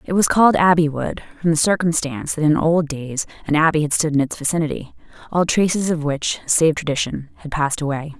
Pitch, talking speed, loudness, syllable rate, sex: 160 Hz, 205 wpm, -19 LUFS, 5.9 syllables/s, female